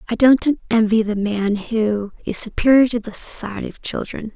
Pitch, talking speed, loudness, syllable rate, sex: 220 Hz, 180 wpm, -18 LUFS, 4.9 syllables/s, female